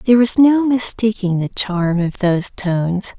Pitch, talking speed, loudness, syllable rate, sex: 205 Hz, 170 wpm, -16 LUFS, 4.6 syllables/s, female